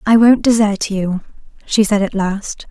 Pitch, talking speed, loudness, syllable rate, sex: 210 Hz, 180 wpm, -15 LUFS, 4.2 syllables/s, female